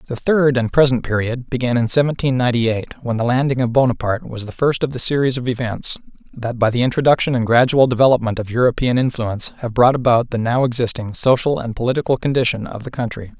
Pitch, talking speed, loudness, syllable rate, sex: 125 Hz, 205 wpm, -18 LUFS, 6.3 syllables/s, male